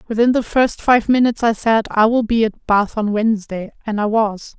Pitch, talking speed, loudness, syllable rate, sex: 220 Hz, 225 wpm, -17 LUFS, 5.2 syllables/s, female